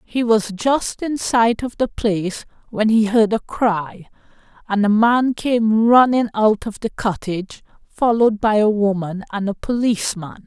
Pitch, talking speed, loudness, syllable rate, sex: 220 Hz, 165 wpm, -18 LUFS, 4.3 syllables/s, female